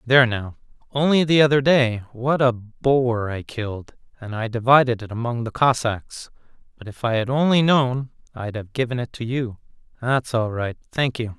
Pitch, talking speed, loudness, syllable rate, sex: 120 Hz, 185 wpm, -21 LUFS, 4.8 syllables/s, male